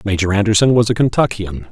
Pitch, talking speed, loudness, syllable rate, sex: 105 Hz, 175 wpm, -15 LUFS, 6.3 syllables/s, male